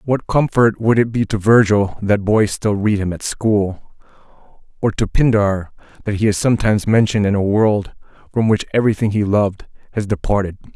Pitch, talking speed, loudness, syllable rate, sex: 105 Hz, 180 wpm, -17 LUFS, 5.4 syllables/s, male